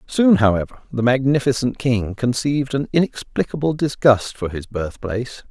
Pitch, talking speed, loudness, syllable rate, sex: 125 Hz, 130 wpm, -19 LUFS, 5.0 syllables/s, male